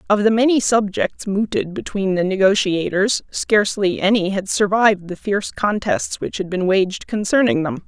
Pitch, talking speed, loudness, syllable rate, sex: 200 Hz, 160 wpm, -18 LUFS, 4.8 syllables/s, female